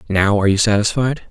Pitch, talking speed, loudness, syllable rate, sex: 105 Hz, 185 wpm, -16 LUFS, 6.7 syllables/s, male